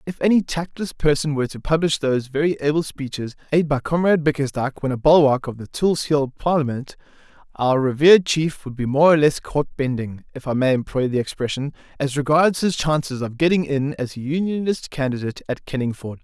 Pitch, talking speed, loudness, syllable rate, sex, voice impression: 145 Hz, 190 wpm, -20 LUFS, 5.7 syllables/s, male, masculine, adult-like, slightly thick, powerful, fluent, raspy, sincere, calm, friendly, slightly unique, wild, lively, slightly strict